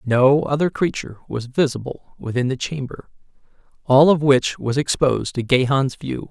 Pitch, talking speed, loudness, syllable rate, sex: 135 Hz, 150 wpm, -19 LUFS, 5.0 syllables/s, male